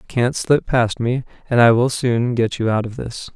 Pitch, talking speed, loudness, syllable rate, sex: 120 Hz, 250 wpm, -18 LUFS, 4.8 syllables/s, male